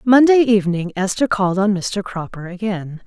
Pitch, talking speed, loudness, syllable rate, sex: 200 Hz, 155 wpm, -18 LUFS, 5.2 syllables/s, female